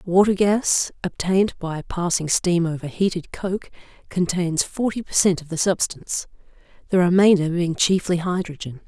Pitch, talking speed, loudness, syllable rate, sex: 180 Hz, 140 wpm, -21 LUFS, 4.7 syllables/s, female